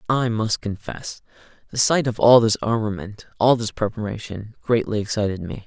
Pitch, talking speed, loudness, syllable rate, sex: 110 Hz, 160 wpm, -21 LUFS, 5.0 syllables/s, male